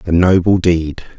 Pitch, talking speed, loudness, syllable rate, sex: 85 Hz, 150 wpm, -13 LUFS, 4.0 syllables/s, male